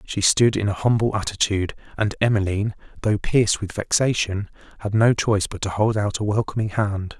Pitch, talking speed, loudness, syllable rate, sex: 105 Hz, 185 wpm, -22 LUFS, 5.7 syllables/s, male